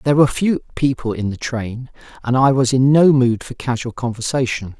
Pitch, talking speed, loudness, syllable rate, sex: 125 Hz, 200 wpm, -17 LUFS, 5.4 syllables/s, male